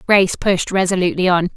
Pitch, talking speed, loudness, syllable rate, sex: 185 Hz, 155 wpm, -16 LUFS, 6.6 syllables/s, female